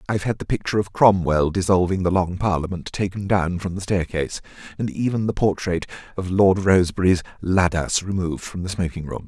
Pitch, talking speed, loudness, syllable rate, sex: 90 Hz, 180 wpm, -21 LUFS, 5.8 syllables/s, male